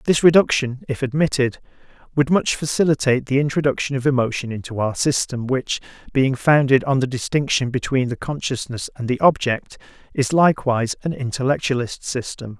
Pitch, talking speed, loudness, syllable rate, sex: 135 Hz, 150 wpm, -20 LUFS, 5.5 syllables/s, male